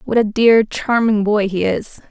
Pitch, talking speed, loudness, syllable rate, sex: 215 Hz, 200 wpm, -16 LUFS, 4.1 syllables/s, female